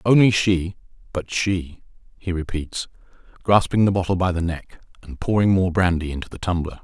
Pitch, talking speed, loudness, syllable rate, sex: 90 Hz, 160 wpm, -21 LUFS, 5.2 syllables/s, male